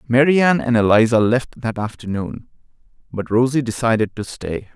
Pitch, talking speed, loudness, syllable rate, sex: 120 Hz, 150 wpm, -18 LUFS, 5.4 syllables/s, male